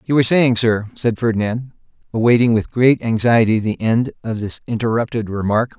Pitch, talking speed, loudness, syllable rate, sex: 115 Hz, 155 wpm, -17 LUFS, 5.1 syllables/s, male